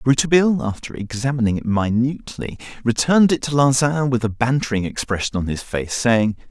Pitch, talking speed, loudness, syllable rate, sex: 125 Hz, 155 wpm, -19 LUFS, 5.8 syllables/s, male